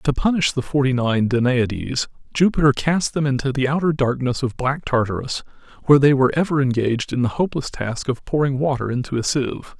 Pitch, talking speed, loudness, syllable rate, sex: 135 Hz, 190 wpm, -20 LUFS, 6.0 syllables/s, male